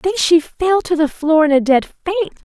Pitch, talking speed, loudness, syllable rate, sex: 335 Hz, 240 wpm, -15 LUFS, 4.4 syllables/s, female